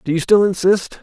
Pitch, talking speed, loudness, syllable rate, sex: 190 Hz, 235 wpm, -15 LUFS, 5.4 syllables/s, male